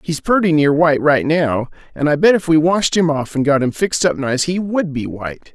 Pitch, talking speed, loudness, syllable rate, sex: 155 Hz, 260 wpm, -16 LUFS, 5.4 syllables/s, male